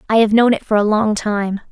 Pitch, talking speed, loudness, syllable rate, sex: 215 Hz, 280 wpm, -15 LUFS, 5.4 syllables/s, female